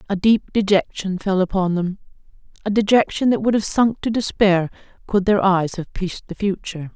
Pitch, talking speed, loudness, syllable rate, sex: 195 Hz, 175 wpm, -19 LUFS, 5.2 syllables/s, female